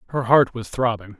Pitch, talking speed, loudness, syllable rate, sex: 115 Hz, 200 wpm, -20 LUFS, 5.4 syllables/s, male